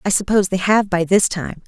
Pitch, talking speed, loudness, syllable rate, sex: 190 Hz, 250 wpm, -17 LUFS, 5.8 syllables/s, female